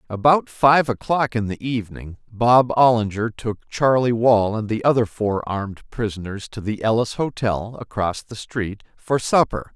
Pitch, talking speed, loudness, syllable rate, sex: 115 Hz, 160 wpm, -20 LUFS, 4.4 syllables/s, male